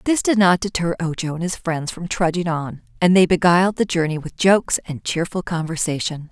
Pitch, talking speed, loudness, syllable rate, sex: 175 Hz, 210 wpm, -19 LUFS, 5.6 syllables/s, female